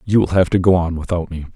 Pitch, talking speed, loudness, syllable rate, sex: 90 Hz, 310 wpm, -17 LUFS, 6.5 syllables/s, male